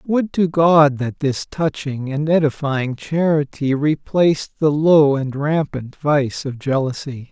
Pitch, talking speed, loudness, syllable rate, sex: 145 Hz, 140 wpm, -18 LUFS, 3.8 syllables/s, male